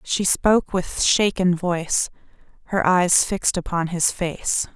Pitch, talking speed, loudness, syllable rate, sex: 180 Hz, 140 wpm, -20 LUFS, 4.0 syllables/s, female